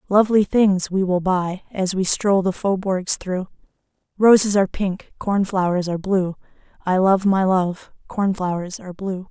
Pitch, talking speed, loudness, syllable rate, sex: 190 Hz, 170 wpm, -20 LUFS, 4.5 syllables/s, female